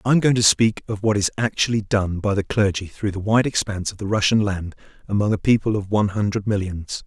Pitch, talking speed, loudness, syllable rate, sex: 105 Hz, 240 wpm, -21 LUFS, 6.0 syllables/s, male